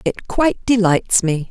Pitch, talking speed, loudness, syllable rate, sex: 205 Hz, 160 wpm, -17 LUFS, 4.3 syllables/s, female